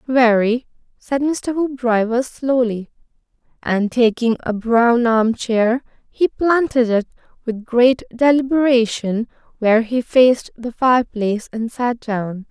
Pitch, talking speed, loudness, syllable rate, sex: 240 Hz, 115 wpm, -17 LUFS, 3.9 syllables/s, female